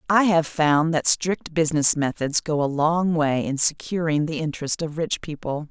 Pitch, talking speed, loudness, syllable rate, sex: 155 Hz, 190 wpm, -22 LUFS, 4.7 syllables/s, female